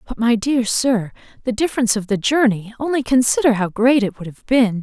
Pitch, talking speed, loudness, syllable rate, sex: 235 Hz, 210 wpm, -18 LUFS, 5.7 syllables/s, female